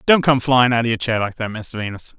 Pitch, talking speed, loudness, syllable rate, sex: 120 Hz, 300 wpm, -18 LUFS, 5.8 syllables/s, male